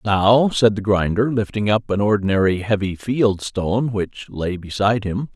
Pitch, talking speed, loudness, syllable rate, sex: 105 Hz, 170 wpm, -19 LUFS, 4.6 syllables/s, male